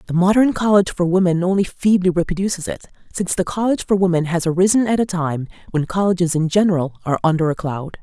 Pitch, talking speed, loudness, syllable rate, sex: 180 Hz, 200 wpm, -18 LUFS, 6.7 syllables/s, female